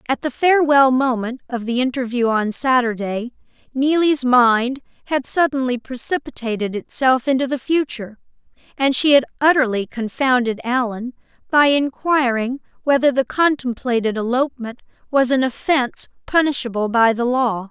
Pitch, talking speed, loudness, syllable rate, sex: 255 Hz, 125 wpm, -18 LUFS, 4.9 syllables/s, female